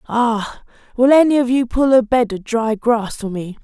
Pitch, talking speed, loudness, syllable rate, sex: 235 Hz, 215 wpm, -16 LUFS, 4.6 syllables/s, female